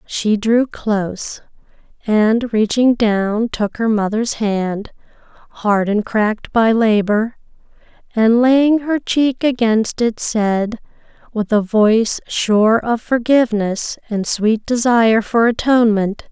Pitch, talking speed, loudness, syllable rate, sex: 220 Hz, 120 wpm, -16 LUFS, 3.6 syllables/s, female